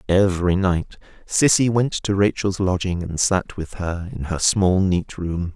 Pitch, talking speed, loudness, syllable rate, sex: 95 Hz, 175 wpm, -20 LUFS, 4.1 syllables/s, male